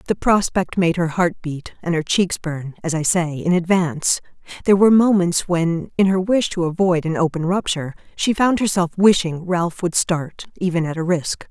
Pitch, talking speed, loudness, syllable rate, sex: 175 Hz, 200 wpm, -19 LUFS, 5.0 syllables/s, female